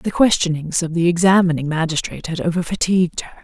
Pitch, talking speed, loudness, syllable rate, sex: 170 Hz, 175 wpm, -18 LUFS, 6.3 syllables/s, female